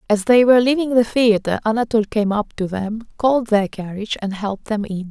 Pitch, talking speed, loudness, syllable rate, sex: 220 Hz, 210 wpm, -18 LUFS, 6.0 syllables/s, female